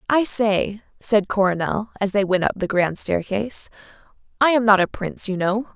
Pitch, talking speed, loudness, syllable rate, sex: 205 Hz, 190 wpm, -20 LUFS, 5.0 syllables/s, female